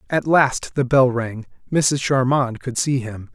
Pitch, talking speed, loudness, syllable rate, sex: 130 Hz, 180 wpm, -19 LUFS, 3.8 syllables/s, male